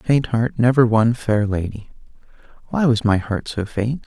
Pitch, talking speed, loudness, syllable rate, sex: 115 Hz, 175 wpm, -19 LUFS, 4.4 syllables/s, male